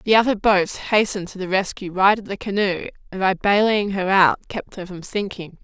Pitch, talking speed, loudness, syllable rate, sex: 195 Hz, 200 wpm, -20 LUFS, 5.3 syllables/s, female